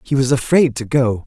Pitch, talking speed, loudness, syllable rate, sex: 130 Hz, 235 wpm, -16 LUFS, 5.1 syllables/s, male